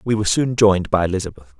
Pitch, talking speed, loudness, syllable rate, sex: 100 Hz, 225 wpm, -18 LUFS, 7.4 syllables/s, male